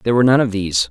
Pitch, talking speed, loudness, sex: 110 Hz, 335 wpm, -16 LUFS, male